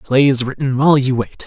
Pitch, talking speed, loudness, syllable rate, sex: 135 Hz, 205 wpm, -15 LUFS, 4.9 syllables/s, male